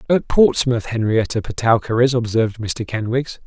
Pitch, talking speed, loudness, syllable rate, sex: 120 Hz, 140 wpm, -18 LUFS, 4.9 syllables/s, male